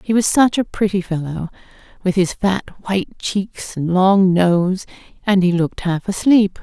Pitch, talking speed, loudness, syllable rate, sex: 190 Hz, 170 wpm, -18 LUFS, 4.4 syllables/s, female